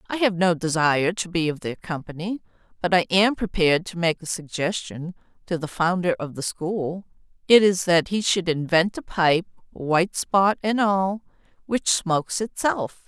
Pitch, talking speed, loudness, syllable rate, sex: 175 Hz, 175 wpm, -22 LUFS, 4.6 syllables/s, female